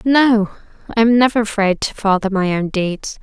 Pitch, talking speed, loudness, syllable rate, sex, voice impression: 210 Hz, 185 wpm, -16 LUFS, 4.9 syllables/s, female, feminine, slightly adult-like, friendly, slightly kind